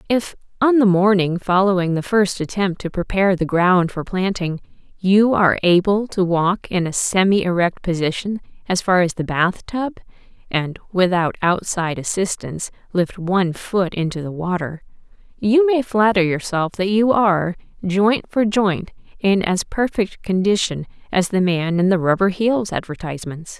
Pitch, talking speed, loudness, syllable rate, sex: 185 Hz, 155 wpm, -19 LUFS, 4.1 syllables/s, female